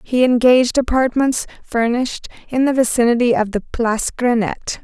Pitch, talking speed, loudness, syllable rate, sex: 240 Hz, 135 wpm, -17 LUFS, 5.8 syllables/s, female